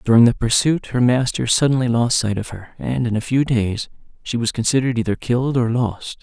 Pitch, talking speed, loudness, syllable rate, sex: 120 Hz, 210 wpm, -19 LUFS, 5.6 syllables/s, male